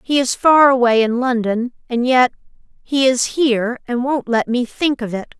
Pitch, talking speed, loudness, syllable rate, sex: 250 Hz, 200 wpm, -16 LUFS, 4.6 syllables/s, female